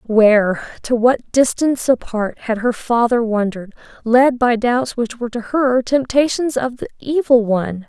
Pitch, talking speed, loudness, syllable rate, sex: 240 Hz, 160 wpm, -17 LUFS, 4.6 syllables/s, female